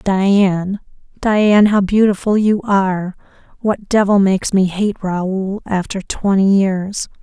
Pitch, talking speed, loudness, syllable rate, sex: 195 Hz, 125 wpm, -15 LUFS, 3.9 syllables/s, female